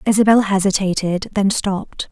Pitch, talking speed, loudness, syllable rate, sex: 200 Hz, 115 wpm, -17 LUFS, 5.2 syllables/s, female